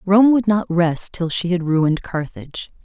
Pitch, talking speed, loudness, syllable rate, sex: 180 Hz, 190 wpm, -18 LUFS, 4.6 syllables/s, female